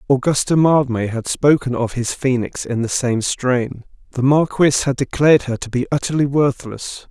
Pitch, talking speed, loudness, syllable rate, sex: 130 Hz, 170 wpm, -18 LUFS, 4.8 syllables/s, male